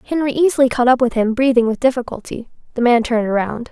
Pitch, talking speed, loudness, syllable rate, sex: 245 Hz, 210 wpm, -16 LUFS, 6.7 syllables/s, female